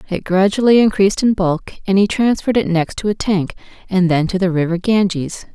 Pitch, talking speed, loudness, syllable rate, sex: 190 Hz, 205 wpm, -16 LUFS, 5.6 syllables/s, female